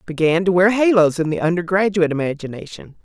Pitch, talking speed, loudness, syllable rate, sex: 175 Hz, 160 wpm, -17 LUFS, 6.3 syllables/s, female